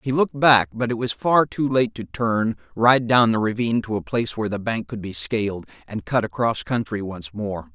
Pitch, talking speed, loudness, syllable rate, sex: 110 Hz, 230 wpm, -21 LUFS, 5.3 syllables/s, male